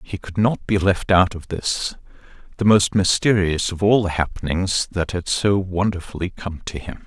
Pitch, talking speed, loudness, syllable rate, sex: 95 Hz, 185 wpm, -20 LUFS, 4.6 syllables/s, male